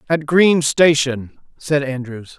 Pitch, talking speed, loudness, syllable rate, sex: 145 Hz, 125 wpm, -16 LUFS, 3.5 syllables/s, male